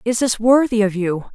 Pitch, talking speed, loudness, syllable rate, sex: 225 Hz, 225 wpm, -17 LUFS, 5.1 syllables/s, female